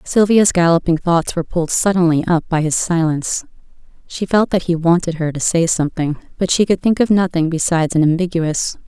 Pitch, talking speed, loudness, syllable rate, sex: 170 Hz, 190 wpm, -16 LUFS, 5.8 syllables/s, female